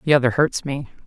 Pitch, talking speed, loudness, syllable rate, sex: 140 Hz, 225 wpm, -21 LUFS, 6.3 syllables/s, female